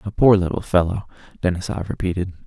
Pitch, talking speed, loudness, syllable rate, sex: 95 Hz, 145 wpm, -21 LUFS, 6.3 syllables/s, male